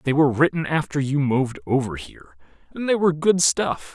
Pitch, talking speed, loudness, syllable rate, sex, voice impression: 140 Hz, 200 wpm, -21 LUFS, 5.9 syllables/s, male, very masculine, slightly middle-aged, thick, tensed, very powerful, bright, soft, slightly muffled, fluent, raspy, cool, very intellectual, refreshing, sincere, slightly calm, slightly friendly, reassuring, slightly unique, slightly elegant, wild, sweet, very lively, slightly kind, intense